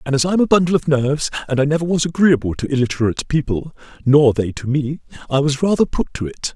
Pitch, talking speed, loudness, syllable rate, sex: 145 Hz, 230 wpm, -18 LUFS, 6.3 syllables/s, male